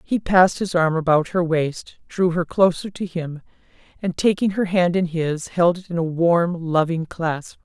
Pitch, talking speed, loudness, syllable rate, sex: 170 Hz, 195 wpm, -20 LUFS, 4.4 syllables/s, female